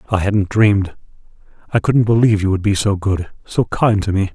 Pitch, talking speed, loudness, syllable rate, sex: 100 Hz, 195 wpm, -16 LUFS, 5.6 syllables/s, male